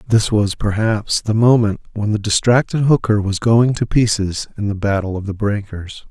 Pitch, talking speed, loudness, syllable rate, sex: 110 Hz, 185 wpm, -17 LUFS, 4.7 syllables/s, male